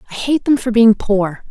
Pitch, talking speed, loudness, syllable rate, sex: 225 Hz, 240 wpm, -14 LUFS, 4.8 syllables/s, female